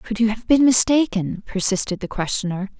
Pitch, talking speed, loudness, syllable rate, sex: 210 Hz, 170 wpm, -19 LUFS, 5.2 syllables/s, female